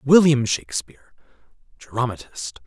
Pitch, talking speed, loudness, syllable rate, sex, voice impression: 130 Hz, 70 wpm, -21 LUFS, 4.6 syllables/s, male, very masculine, slightly middle-aged, thick, tensed, very powerful, bright, soft, slightly muffled, fluent, raspy, cool, very intellectual, refreshing, sincere, slightly calm, slightly friendly, reassuring, slightly unique, slightly elegant, wild, sweet, very lively, slightly kind, intense